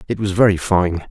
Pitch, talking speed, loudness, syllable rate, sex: 95 Hz, 220 wpm, -17 LUFS, 5.4 syllables/s, male